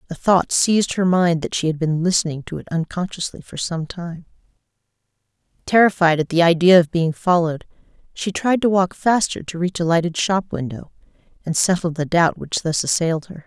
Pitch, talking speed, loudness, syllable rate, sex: 175 Hz, 185 wpm, -19 LUFS, 5.4 syllables/s, female